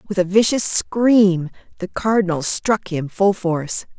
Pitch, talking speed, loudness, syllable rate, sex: 190 Hz, 150 wpm, -18 LUFS, 4.1 syllables/s, female